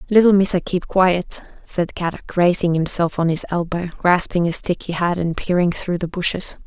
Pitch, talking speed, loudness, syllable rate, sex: 175 Hz, 190 wpm, -19 LUFS, 5.1 syllables/s, female